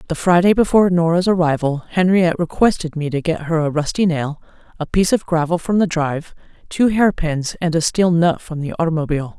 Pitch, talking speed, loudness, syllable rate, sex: 170 Hz, 200 wpm, -17 LUFS, 5.8 syllables/s, female